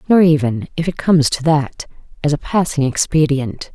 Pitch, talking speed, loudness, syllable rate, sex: 150 Hz, 175 wpm, -16 LUFS, 5.1 syllables/s, female